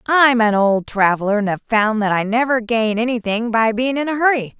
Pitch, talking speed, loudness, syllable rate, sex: 230 Hz, 220 wpm, -17 LUFS, 5.2 syllables/s, female